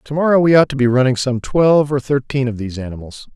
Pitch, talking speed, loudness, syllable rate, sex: 130 Hz, 250 wpm, -15 LUFS, 6.5 syllables/s, male